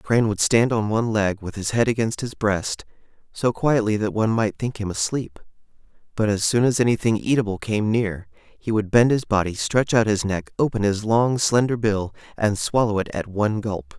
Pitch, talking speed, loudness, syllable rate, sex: 110 Hz, 210 wpm, -21 LUFS, 5.2 syllables/s, male